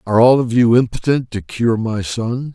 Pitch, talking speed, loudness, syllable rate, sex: 115 Hz, 210 wpm, -16 LUFS, 4.9 syllables/s, male